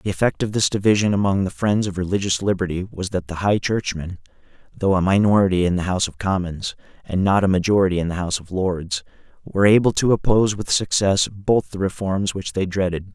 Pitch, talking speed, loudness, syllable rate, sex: 95 Hz, 205 wpm, -20 LUFS, 6.0 syllables/s, male